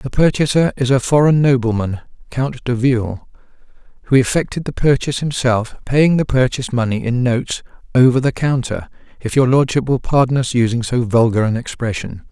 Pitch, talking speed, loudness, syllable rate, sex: 125 Hz, 165 wpm, -16 LUFS, 5.5 syllables/s, male